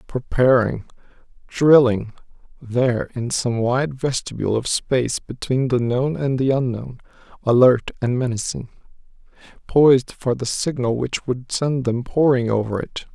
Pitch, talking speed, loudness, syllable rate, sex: 125 Hz, 130 wpm, -20 LUFS, 4.4 syllables/s, male